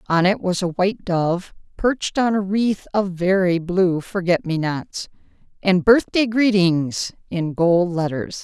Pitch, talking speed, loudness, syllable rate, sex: 185 Hz, 155 wpm, -20 LUFS, 4.0 syllables/s, female